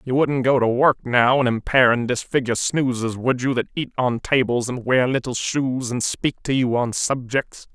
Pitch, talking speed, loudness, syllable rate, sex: 125 Hz, 210 wpm, -20 LUFS, 4.8 syllables/s, male